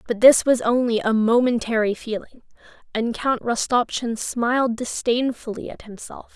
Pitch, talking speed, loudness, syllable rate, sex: 235 Hz, 130 wpm, -21 LUFS, 4.6 syllables/s, female